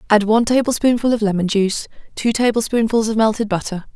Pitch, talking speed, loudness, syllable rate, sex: 220 Hz, 165 wpm, -17 LUFS, 6.5 syllables/s, female